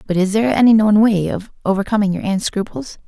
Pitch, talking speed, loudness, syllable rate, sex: 210 Hz, 215 wpm, -16 LUFS, 6.2 syllables/s, female